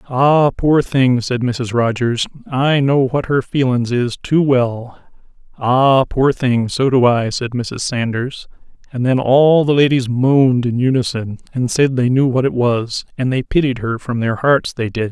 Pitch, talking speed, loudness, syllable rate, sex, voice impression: 125 Hz, 185 wpm, -16 LUFS, 4.1 syllables/s, male, masculine, adult-like, tensed, powerful, hard, clear, fluent, intellectual, calm, mature, reassuring, wild, lively, slightly kind